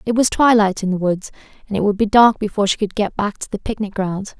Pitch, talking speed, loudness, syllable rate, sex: 205 Hz, 275 wpm, -18 LUFS, 6.1 syllables/s, female